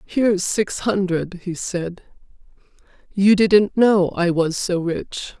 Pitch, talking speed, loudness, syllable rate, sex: 190 Hz, 120 wpm, -19 LUFS, 3.4 syllables/s, female